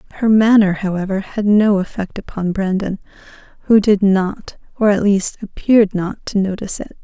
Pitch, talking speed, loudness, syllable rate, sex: 200 Hz, 160 wpm, -16 LUFS, 5.1 syllables/s, female